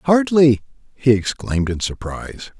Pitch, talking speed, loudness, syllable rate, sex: 125 Hz, 115 wpm, -18 LUFS, 4.9 syllables/s, male